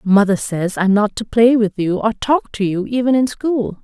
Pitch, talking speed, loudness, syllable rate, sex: 215 Hz, 235 wpm, -16 LUFS, 4.6 syllables/s, female